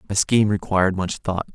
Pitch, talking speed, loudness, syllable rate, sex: 100 Hz, 195 wpm, -21 LUFS, 6.2 syllables/s, male